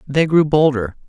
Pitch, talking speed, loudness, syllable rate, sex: 140 Hz, 165 wpm, -16 LUFS, 4.7 syllables/s, male